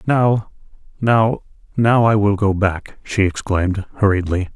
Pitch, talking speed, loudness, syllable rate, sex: 105 Hz, 105 wpm, -17 LUFS, 4.1 syllables/s, male